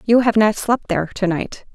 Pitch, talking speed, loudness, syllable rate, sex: 210 Hz, 240 wpm, -18 LUFS, 5.3 syllables/s, female